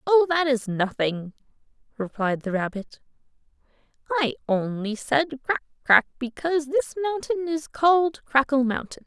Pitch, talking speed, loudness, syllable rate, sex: 270 Hz, 125 wpm, -24 LUFS, 4.5 syllables/s, female